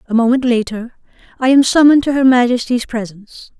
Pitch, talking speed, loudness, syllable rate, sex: 245 Hz, 165 wpm, -13 LUFS, 5.9 syllables/s, female